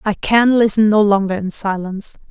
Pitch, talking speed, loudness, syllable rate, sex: 205 Hz, 180 wpm, -15 LUFS, 5.2 syllables/s, female